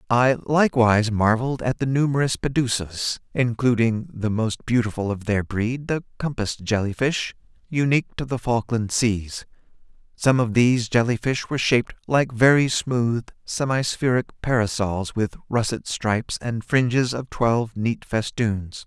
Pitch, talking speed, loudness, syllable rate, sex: 120 Hz, 135 wpm, -22 LUFS, 4.6 syllables/s, male